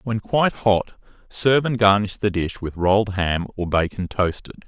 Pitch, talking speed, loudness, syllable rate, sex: 100 Hz, 180 wpm, -21 LUFS, 4.9 syllables/s, male